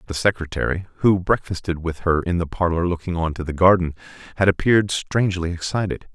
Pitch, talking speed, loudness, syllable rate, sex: 90 Hz, 175 wpm, -21 LUFS, 5.9 syllables/s, male